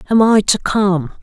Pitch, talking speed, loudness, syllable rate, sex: 200 Hz, 195 wpm, -14 LUFS, 4.4 syllables/s, male